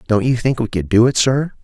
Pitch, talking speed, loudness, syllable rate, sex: 120 Hz, 295 wpm, -16 LUFS, 5.6 syllables/s, male